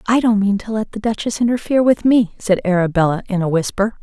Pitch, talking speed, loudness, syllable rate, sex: 210 Hz, 225 wpm, -17 LUFS, 6.0 syllables/s, female